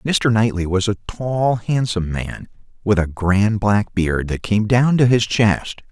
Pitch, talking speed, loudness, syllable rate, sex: 105 Hz, 185 wpm, -18 LUFS, 4.0 syllables/s, male